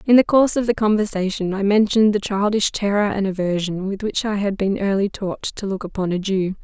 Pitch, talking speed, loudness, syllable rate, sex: 200 Hz, 225 wpm, -20 LUFS, 5.7 syllables/s, female